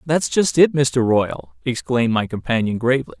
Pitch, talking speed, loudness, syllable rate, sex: 125 Hz, 170 wpm, -19 LUFS, 5.4 syllables/s, male